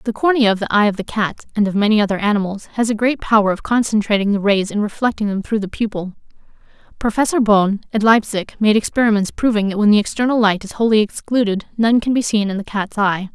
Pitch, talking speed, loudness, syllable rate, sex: 210 Hz, 225 wpm, -17 LUFS, 6.2 syllables/s, female